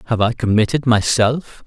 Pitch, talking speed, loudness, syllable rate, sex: 115 Hz, 145 wpm, -17 LUFS, 4.8 syllables/s, male